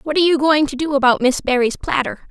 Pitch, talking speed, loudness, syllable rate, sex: 285 Hz, 260 wpm, -17 LUFS, 6.4 syllables/s, female